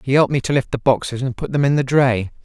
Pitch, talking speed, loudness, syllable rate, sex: 130 Hz, 320 wpm, -18 LUFS, 6.7 syllables/s, male